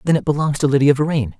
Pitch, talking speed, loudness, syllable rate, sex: 145 Hz, 260 wpm, -17 LUFS, 6.2 syllables/s, male